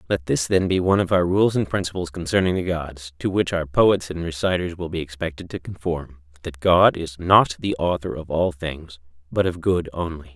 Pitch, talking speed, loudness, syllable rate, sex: 85 Hz, 210 wpm, -22 LUFS, 5.2 syllables/s, male